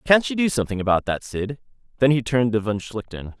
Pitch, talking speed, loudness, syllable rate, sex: 120 Hz, 230 wpm, -22 LUFS, 6.3 syllables/s, male